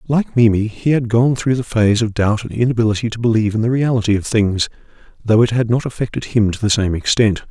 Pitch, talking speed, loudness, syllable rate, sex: 115 Hz, 230 wpm, -16 LUFS, 6.2 syllables/s, male